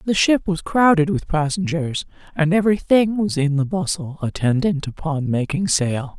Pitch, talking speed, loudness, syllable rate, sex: 170 Hz, 165 wpm, -20 LUFS, 4.7 syllables/s, female